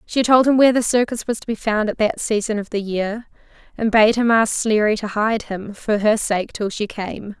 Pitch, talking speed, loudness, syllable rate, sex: 220 Hz, 245 wpm, -19 LUFS, 5.0 syllables/s, female